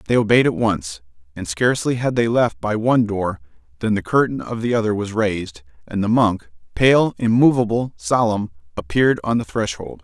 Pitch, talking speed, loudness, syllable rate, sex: 110 Hz, 180 wpm, -19 LUFS, 5.2 syllables/s, male